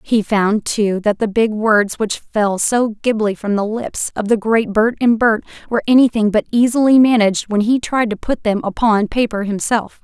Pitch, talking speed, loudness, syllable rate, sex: 220 Hz, 205 wpm, -16 LUFS, 4.8 syllables/s, female